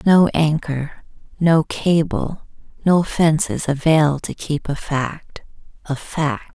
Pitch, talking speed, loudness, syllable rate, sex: 155 Hz, 120 wpm, -19 LUFS, 3.3 syllables/s, female